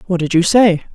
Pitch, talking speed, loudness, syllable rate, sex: 185 Hz, 255 wpm, -13 LUFS, 5.6 syllables/s, female